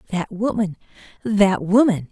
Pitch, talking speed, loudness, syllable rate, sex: 200 Hz, 85 wpm, -19 LUFS, 4.3 syllables/s, female